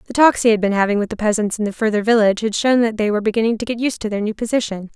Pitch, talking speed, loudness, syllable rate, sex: 220 Hz, 315 wpm, -18 LUFS, 7.6 syllables/s, female